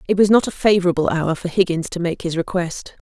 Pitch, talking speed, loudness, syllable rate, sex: 175 Hz, 235 wpm, -19 LUFS, 6.0 syllables/s, female